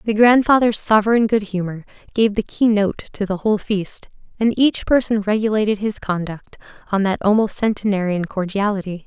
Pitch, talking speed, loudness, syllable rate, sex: 205 Hz, 160 wpm, -18 LUFS, 5.3 syllables/s, female